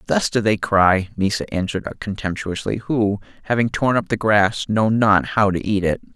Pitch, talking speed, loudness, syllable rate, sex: 105 Hz, 185 wpm, -19 LUFS, 4.8 syllables/s, male